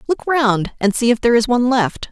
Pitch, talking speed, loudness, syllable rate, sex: 240 Hz, 255 wpm, -16 LUFS, 5.8 syllables/s, female